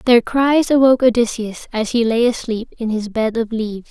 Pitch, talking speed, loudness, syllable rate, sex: 235 Hz, 200 wpm, -17 LUFS, 5.2 syllables/s, female